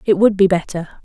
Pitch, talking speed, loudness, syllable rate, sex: 190 Hz, 230 wpm, -15 LUFS, 6.2 syllables/s, female